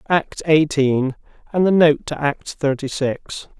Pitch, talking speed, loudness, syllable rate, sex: 150 Hz, 150 wpm, -19 LUFS, 3.8 syllables/s, male